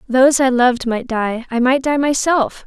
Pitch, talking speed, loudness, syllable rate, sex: 255 Hz, 205 wpm, -16 LUFS, 4.9 syllables/s, female